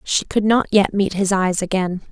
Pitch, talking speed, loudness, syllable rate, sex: 195 Hz, 225 wpm, -18 LUFS, 4.7 syllables/s, female